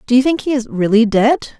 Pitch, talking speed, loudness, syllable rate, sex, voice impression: 245 Hz, 265 wpm, -14 LUFS, 6.3 syllables/s, female, feminine, adult-like, slightly relaxed, slightly dark, soft, slightly muffled, calm, slightly friendly, reassuring, elegant, kind, modest